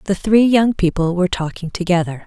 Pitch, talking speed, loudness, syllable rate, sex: 185 Hz, 185 wpm, -17 LUFS, 5.7 syllables/s, female